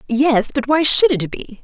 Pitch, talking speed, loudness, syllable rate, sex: 245 Hz, 220 wpm, -14 LUFS, 4.2 syllables/s, female